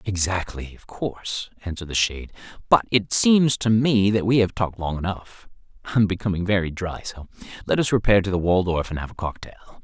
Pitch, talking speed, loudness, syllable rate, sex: 95 Hz, 200 wpm, -22 LUFS, 5.7 syllables/s, male